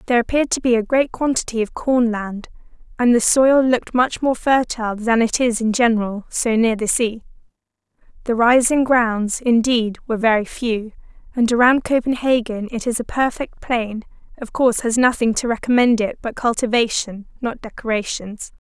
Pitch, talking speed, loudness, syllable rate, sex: 235 Hz, 165 wpm, -18 LUFS, 5.2 syllables/s, female